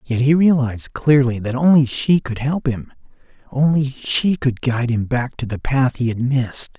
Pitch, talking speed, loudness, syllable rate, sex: 130 Hz, 195 wpm, -18 LUFS, 4.8 syllables/s, male